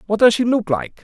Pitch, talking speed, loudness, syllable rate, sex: 210 Hz, 290 wpm, -17 LUFS, 5.8 syllables/s, male